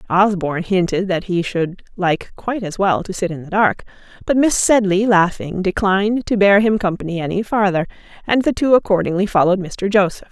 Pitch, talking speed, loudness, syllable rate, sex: 190 Hz, 185 wpm, -17 LUFS, 5.5 syllables/s, female